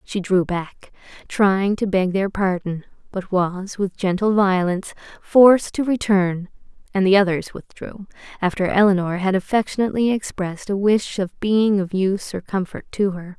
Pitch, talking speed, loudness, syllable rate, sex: 195 Hz, 155 wpm, -20 LUFS, 4.7 syllables/s, female